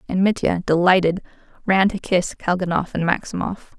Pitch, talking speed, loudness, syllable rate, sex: 180 Hz, 145 wpm, -20 LUFS, 5.2 syllables/s, female